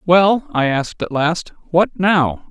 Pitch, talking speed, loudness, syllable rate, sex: 170 Hz, 170 wpm, -17 LUFS, 3.8 syllables/s, male